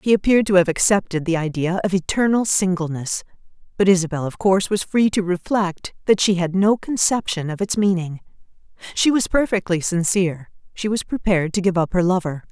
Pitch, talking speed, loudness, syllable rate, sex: 185 Hz, 180 wpm, -19 LUFS, 5.7 syllables/s, female